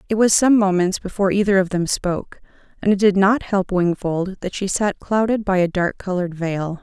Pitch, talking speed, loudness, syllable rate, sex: 190 Hz, 210 wpm, -19 LUFS, 5.4 syllables/s, female